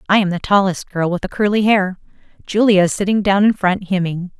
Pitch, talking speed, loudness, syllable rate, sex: 190 Hz, 220 wpm, -16 LUFS, 5.7 syllables/s, female